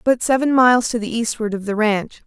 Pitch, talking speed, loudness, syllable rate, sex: 230 Hz, 240 wpm, -18 LUFS, 6.1 syllables/s, female